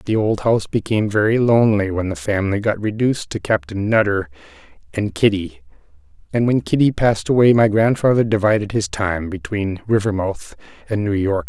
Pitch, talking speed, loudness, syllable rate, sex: 105 Hz, 160 wpm, -18 LUFS, 5.5 syllables/s, male